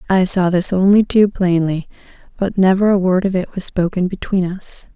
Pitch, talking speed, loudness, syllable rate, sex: 185 Hz, 195 wpm, -16 LUFS, 5.0 syllables/s, female